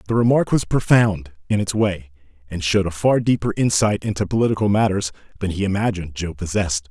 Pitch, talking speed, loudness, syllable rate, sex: 95 Hz, 185 wpm, -20 LUFS, 6.1 syllables/s, male